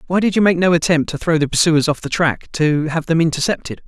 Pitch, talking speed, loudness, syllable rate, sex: 160 Hz, 265 wpm, -17 LUFS, 6.0 syllables/s, male